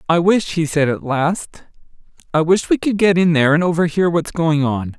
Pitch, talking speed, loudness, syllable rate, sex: 165 Hz, 215 wpm, -17 LUFS, 5.1 syllables/s, male